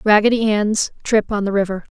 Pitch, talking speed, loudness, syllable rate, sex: 210 Hz, 185 wpm, -18 LUFS, 5.4 syllables/s, female